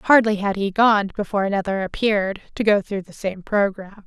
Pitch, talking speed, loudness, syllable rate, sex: 200 Hz, 190 wpm, -21 LUFS, 5.5 syllables/s, female